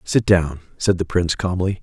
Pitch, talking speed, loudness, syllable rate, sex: 90 Hz, 195 wpm, -20 LUFS, 5.1 syllables/s, male